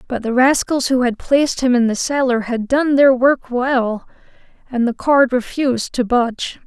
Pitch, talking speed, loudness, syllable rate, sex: 250 Hz, 190 wpm, -16 LUFS, 4.6 syllables/s, female